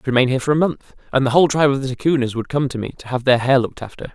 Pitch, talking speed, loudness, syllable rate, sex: 135 Hz, 345 wpm, -18 LUFS, 8.2 syllables/s, male